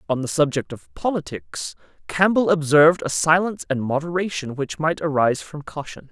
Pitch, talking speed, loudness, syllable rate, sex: 150 Hz, 155 wpm, -21 LUFS, 5.4 syllables/s, male